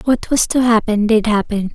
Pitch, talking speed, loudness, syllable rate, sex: 220 Hz, 205 wpm, -15 LUFS, 4.9 syllables/s, female